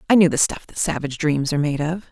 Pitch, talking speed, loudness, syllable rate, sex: 155 Hz, 285 wpm, -20 LUFS, 6.8 syllables/s, female